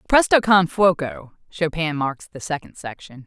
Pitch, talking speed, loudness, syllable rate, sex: 165 Hz, 145 wpm, -20 LUFS, 4.5 syllables/s, female